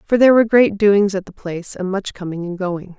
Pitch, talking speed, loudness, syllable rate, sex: 195 Hz, 260 wpm, -17 LUFS, 5.9 syllables/s, female